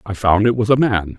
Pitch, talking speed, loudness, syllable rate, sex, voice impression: 105 Hz, 305 wpm, -16 LUFS, 5.6 syllables/s, male, very masculine, old, very thick, tensed, powerful, slightly dark, slightly hard, slightly muffled, slightly raspy, cool, intellectual, sincere, very calm, very mature, very friendly, reassuring, very unique, elegant, very wild, slightly sweet, slightly lively, kind, slightly intense